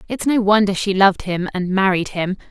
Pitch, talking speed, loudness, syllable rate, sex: 195 Hz, 190 wpm, -18 LUFS, 5.5 syllables/s, female